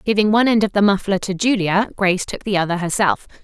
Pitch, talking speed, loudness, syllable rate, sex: 200 Hz, 225 wpm, -18 LUFS, 6.4 syllables/s, female